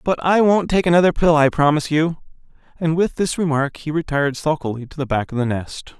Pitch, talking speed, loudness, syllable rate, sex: 155 Hz, 220 wpm, -19 LUFS, 5.8 syllables/s, male